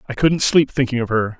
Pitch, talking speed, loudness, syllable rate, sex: 130 Hz, 260 wpm, -18 LUFS, 5.5 syllables/s, male